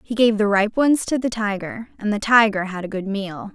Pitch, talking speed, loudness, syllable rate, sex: 210 Hz, 255 wpm, -20 LUFS, 5.1 syllables/s, female